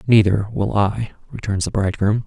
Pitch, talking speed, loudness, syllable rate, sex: 105 Hz, 160 wpm, -20 LUFS, 5.3 syllables/s, male